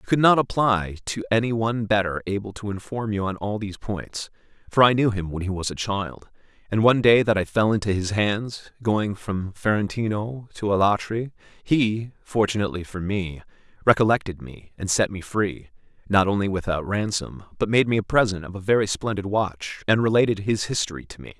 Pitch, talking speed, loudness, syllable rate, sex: 105 Hz, 195 wpm, -23 LUFS, 5.4 syllables/s, male